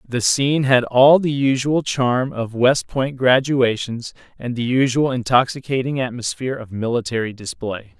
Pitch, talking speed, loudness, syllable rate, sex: 125 Hz, 145 wpm, -19 LUFS, 4.6 syllables/s, male